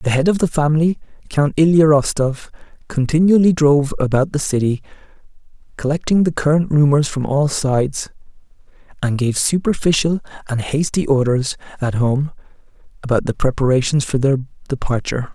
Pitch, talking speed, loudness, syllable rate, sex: 145 Hz, 135 wpm, -17 LUFS, 5.4 syllables/s, male